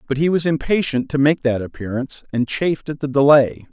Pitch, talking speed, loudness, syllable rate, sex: 140 Hz, 210 wpm, -18 LUFS, 5.8 syllables/s, male